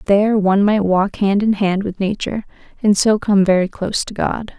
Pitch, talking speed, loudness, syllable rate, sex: 200 Hz, 210 wpm, -17 LUFS, 5.4 syllables/s, female